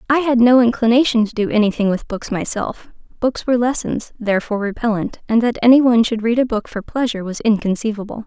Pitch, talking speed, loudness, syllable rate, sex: 230 Hz, 195 wpm, -17 LUFS, 6.3 syllables/s, female